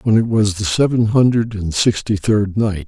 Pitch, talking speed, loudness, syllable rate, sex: 105 Hz, 210 wpm, -16 LUFS, 4.7 syllables/s, male